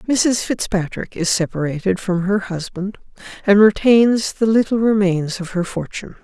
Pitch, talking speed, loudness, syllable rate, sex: 200 Hz, 145 wpm, -18 LUFS, 4.6 syllables/s, female